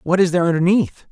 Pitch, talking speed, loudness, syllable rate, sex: 175 Hz, 215 wpm, -17 LUFS, 6.6 syllables/s, male